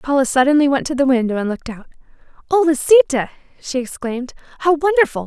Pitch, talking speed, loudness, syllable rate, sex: 280 Hz, 170 wpm, -17 LUFS, 6.8 syllables/s, female